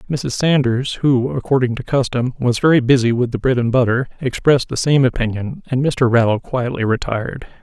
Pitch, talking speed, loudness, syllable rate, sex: 125 Hz, 180 wpm, -17 LUFS, 5.4 syllables/s, male